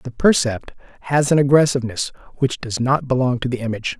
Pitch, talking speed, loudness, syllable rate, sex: 130 Hz, 180 wpm, -19 LUFS, 6.0 syllables/s, male